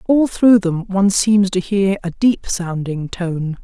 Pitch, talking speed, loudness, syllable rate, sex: 190 Hz, 180 wpm, -17 LUFS, 3.8 syllables/s, female